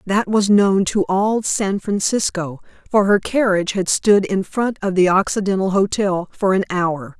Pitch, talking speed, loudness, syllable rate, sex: 195 Hz, 175 wpm, -18 LUFS, 4.4 syllables/s, female